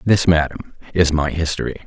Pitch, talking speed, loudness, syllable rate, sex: 80 Hz, 160 wpm, -18 LUFS, 5.2 syllables/s, male